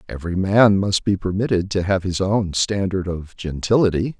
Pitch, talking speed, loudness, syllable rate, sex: 95 Hz, 170 wpm, -20 LUFS, 5.0 syllables/s, male